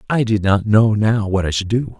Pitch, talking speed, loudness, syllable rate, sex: 105 Hz, 270 wpm, -17 LUFS, 5.0 syllables/s, male